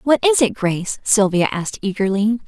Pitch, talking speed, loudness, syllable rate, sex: 210 Hz, 170 wpm, -18 LUFS, 5.3 syllables/s, female